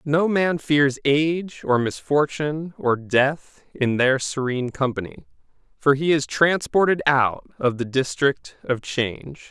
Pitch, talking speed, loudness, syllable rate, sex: 140 Hz, 140 wpm, -21 LUFS, 4.0 syllables/s, male